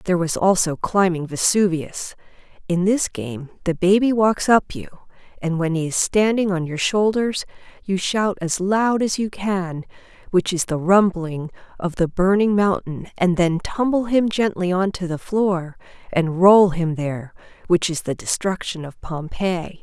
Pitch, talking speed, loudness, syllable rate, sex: 185 Hz, 165 wpm, -20 LUFS, 4.3 syllables/s, female